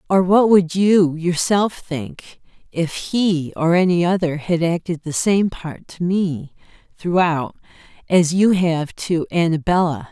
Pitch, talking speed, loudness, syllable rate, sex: 170 Hz, 140 wpm, -18 LUFS, 3.7 syllables/s, female